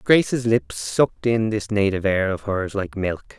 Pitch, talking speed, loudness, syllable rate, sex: 105 Hz, 195 wpm, -22 LUFS, 4.6 syllables/s, male